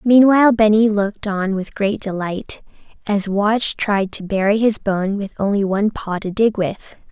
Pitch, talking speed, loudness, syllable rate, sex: 205 Hz, 175 wpm, -18 LUFS, 4.6 syllables/s, female